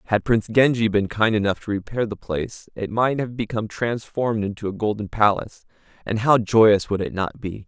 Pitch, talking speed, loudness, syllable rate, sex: 105 Hz, 205 wpm, -22 LUFS, 5.6 syllables/s, male